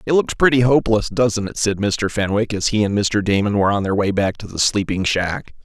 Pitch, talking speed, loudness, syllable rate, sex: 105 Hz, 245 wpm, -18 LUFS, 5.5 syllables/s, male